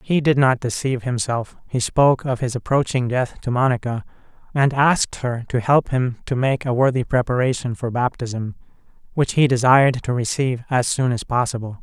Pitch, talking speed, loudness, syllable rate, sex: 125 Hz, 180 wpm, -20 LUFS, 5.3 syllables/s, male